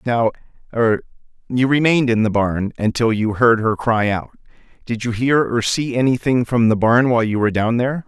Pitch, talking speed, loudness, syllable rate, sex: 120 Hz, 185 wpm, -17 LUFS, 5.5 syllables/s, male